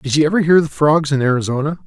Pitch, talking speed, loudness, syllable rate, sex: 150 Hz, 260 wpm, -15 LUFS, 6.8 syllables/s, male